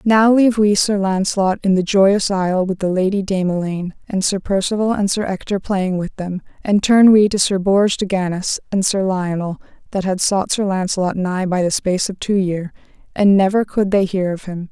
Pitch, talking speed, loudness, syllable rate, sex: 195 Hz, 215 wpm, -17 LUFS, 5.3 syllables/s, female